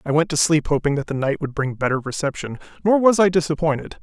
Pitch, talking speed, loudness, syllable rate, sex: 150 Hz, 240 wpm, -20 LUFS, 6.3 syllables/s, male